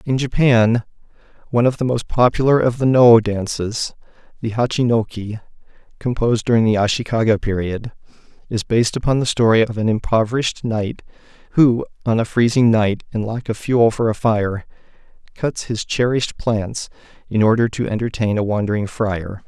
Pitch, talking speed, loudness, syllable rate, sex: 115 Hz, 155 wpm, -18 LUFS, 5.3 syllables/s, male